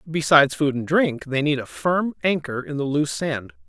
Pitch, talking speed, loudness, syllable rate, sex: 145 Hz, 210 wpm, -21 LUFS, 5.1 syllables/s, male